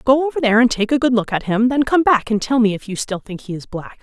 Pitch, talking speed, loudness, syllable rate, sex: 235 Hz, 345 wpm, -17 LUFS, 6.4 syllables/s, female